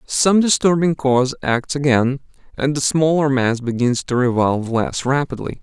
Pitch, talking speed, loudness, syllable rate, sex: 135 Hz, 150 wpm, -18 LUFS, 4.7 syllables/s, male